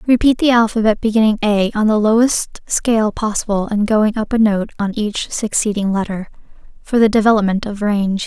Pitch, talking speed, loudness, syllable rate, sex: 215 Hz, 175 wpm, -16 LUFS, 5.5 syllables/s, female